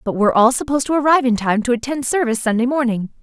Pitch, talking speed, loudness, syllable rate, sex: 245 Hz, 240 wpm, -17 LUFS, 7.5 syllables/s, female